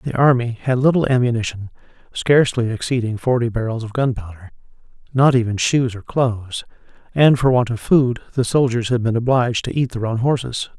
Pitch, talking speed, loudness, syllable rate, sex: 120 Hz, 170 wpm, -18 LUFS, 5.6 syllables/s, male